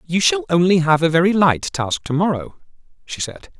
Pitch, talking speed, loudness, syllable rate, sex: 160 Hz, 200 wpm, -18 LUFS, 5.2 syllables/s, male